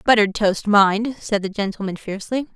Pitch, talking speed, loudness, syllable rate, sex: 205 Hz, 165 wpm, -20 LUFS, 5.6 syllables/s, female